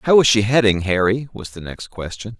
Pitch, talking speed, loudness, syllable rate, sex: 105 Hz, 225 wpm, -17 LUFS, 5.2 syllables/s, male